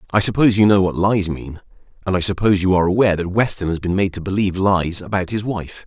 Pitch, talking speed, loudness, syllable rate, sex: 95 Hz, 245 wpm, -18 LUFS, 6.8 syllables/s, male